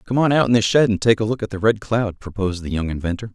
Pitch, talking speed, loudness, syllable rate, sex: 105 Hz, 325 wpm, -19 LUFS, 6.9 syllables/s, male